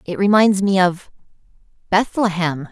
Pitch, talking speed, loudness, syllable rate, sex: 190 Hz, 90 wpm, -17 LUFS, 4.4 syllables/s, female